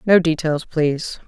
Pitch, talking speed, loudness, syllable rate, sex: 160 Hz, 140 wpm, -19 LUFS, 4.6 syllables/s, female